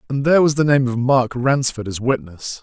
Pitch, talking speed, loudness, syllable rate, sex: 125 Hz, 230 wpm, -17 LUFS, 5.4 syllables/s, male